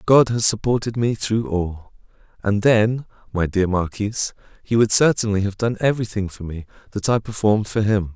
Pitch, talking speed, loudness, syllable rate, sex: 105 Hz, 175 wpm, -20 LUFS, 5.3 syllables/s, male